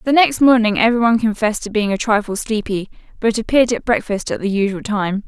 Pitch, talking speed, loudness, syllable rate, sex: 220 Hz, 215 wpm, -17 LUFS, 6.4 syllables/s, female